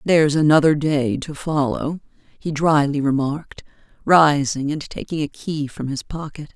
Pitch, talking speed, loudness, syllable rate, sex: 150 Hz, 145 wpm, -20 LUFS, 4.5 syllables/s, female